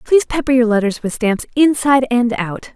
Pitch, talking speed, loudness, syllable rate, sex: 245 Hz, 195 wpm, -16 LUFS, 5.5 syllables/s, female